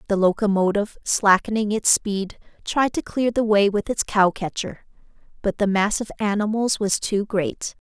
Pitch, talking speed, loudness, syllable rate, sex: 205 Hz, 170 wpm, -21 LUFS, 4.7 syllables/s, female